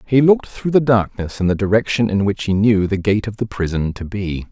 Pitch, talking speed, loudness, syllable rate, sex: 105 Hz, 255 wpm, -18 LUFS, 5.5 syllables/s, male